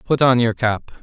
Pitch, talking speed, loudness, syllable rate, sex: 120 Hz, 235 wpm, -17 LUFS, 5.1 syllables/s, male